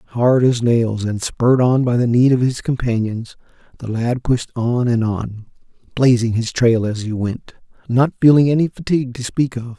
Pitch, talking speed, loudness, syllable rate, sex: 120 Hz, 190 wpm, -17 LUFS, 4.6 syllables/s, male